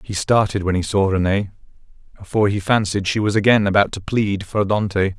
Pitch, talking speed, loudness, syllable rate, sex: 100 Hz, 195 wpm, -19 LUFS, 5.3 syllables/s, male